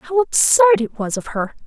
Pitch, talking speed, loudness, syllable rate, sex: 265 Hz, 215 wpm, -16 LUFS, 5.1 syllables/s, female